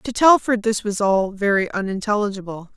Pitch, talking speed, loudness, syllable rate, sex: 205 Hz, 150 wpm, -19 LUFS, 5.2 syllables/s, female